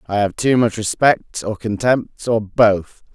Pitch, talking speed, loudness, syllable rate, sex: 110 Hz, 170 wpm, -18 LUFS, 3.8 syllables/s, male